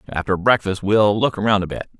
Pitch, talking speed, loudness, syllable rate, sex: 100 Hz, 210 wpm, -18 LUFS, 5.7 syllables/s, male